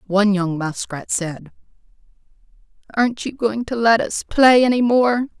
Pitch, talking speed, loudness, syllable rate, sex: 195 Hz, 145 wpm, -18 LUFS, 4.6 syllables/s, female